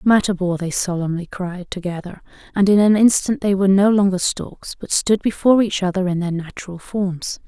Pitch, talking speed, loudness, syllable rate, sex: 190 Hz, 185 wpm, -18 LUFS, 5.3 syllables/s, female